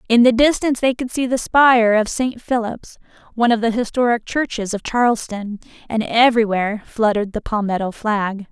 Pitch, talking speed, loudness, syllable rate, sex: 230 Hz, 170 wpm, -18 LUFS, 5.5 syllables/s, female